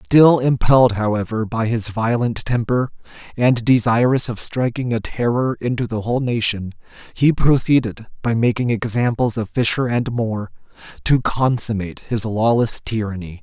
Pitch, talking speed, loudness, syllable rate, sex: 115 Hz, 140 wpm, -19 LUFS, 4.7 syllables/s, male